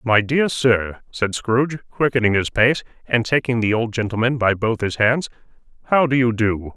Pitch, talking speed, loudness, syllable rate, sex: 120 Hz, 185 wpm, -19 LUFS, 4.8 syllables/s, male